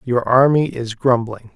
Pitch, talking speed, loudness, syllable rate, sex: 120 Hz, 155 wpm, -17 LUFS, 4.1 syllables/s, male